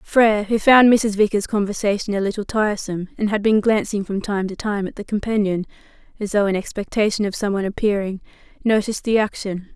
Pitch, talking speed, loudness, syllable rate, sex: 205 Hz, 185 wpm, -20 LUFS, 6.1 syllables/s, female